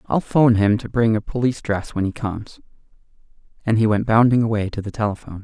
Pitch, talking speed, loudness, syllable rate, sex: 110 Hz, 210 wpm, -20 LUFS, 6.6 syllables/s, male